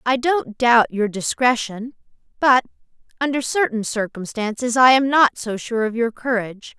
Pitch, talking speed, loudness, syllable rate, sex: 240 Hz, 150 wpm, -19 LUFS, 3.8 syllables/s, female